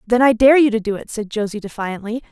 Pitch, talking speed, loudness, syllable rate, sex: 225 Hz, 260 wpm, -17 LUFS, 6.1 syllables/s, female